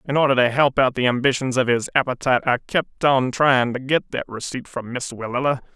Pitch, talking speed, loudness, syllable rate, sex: 130 Hz, 220 wpm, -20 LUFS, 5.7 syllables/s, male